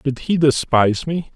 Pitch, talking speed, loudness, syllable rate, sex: 140 Hz, 175 wpm, -18 LUFS, 4.7 syllables/s, male